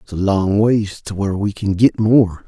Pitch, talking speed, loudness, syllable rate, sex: 100 Hz, 240 wpm, -16 LUFS, 4.6 syllables/s, male